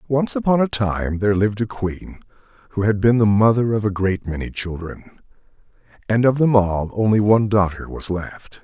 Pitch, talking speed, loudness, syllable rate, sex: 105 Hz, 190 wpm, -19 LUFS, 5.1 syllables/s, male